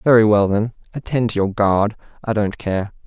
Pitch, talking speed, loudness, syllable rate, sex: 105 Hz, 195 wpm, -19 LUFS, 5.0 syllables/s, male